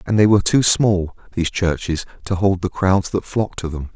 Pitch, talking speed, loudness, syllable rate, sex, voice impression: 95 Hz, 225 wpm, -19 LUFS, 5.5 syllables/s, male, masculine, adult-like, cool, slightly intellectual, slightly calm, kind